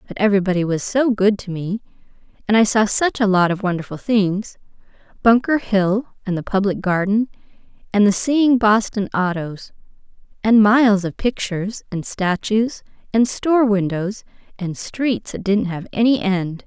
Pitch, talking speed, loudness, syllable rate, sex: 205 Hz, 150 wpm, -19 LUFS, 4.7 syllables/s, female